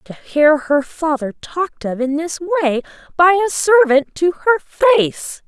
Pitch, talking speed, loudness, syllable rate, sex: 320 Hz, 165 wpm, -16 LUFS, 4.1 syllables/s, female